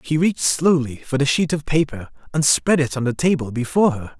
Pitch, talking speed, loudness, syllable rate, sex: 145 Hz, 230 wpm, -19 LUFS, 5.7 syllables/s, male